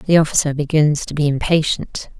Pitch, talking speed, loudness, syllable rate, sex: 150 Hz, 165 wpm, -17 LUFS, 5.2 syllables/s, female